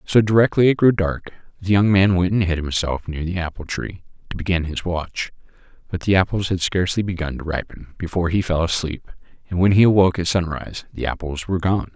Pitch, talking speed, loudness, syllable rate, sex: 90 Hz, 210 wpm, -20 LUFS, 6.0 syllables/s, male